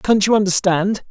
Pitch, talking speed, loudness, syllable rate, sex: 195 Hz, 165 wpm, -16 LUFS, 4.8 syllables/s, male